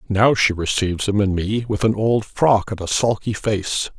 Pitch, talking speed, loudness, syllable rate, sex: 105 Hz, 210 wpm, -19 LUFS, 4.6 syllables/s, male